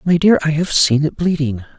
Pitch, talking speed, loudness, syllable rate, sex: 155 Hz, 235 wpm, -15 LUFS, 5.3 syllables/s, male